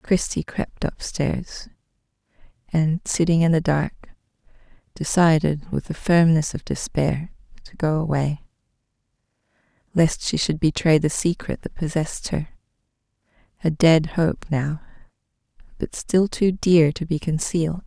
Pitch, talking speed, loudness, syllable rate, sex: 160 Hz, 125 wpm, -22 LUFS, 4.2 syllables/s, female